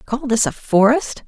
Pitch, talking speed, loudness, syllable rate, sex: 240 Hz, 190 wpm, -17 LUFS, 4.1 syllables/s, female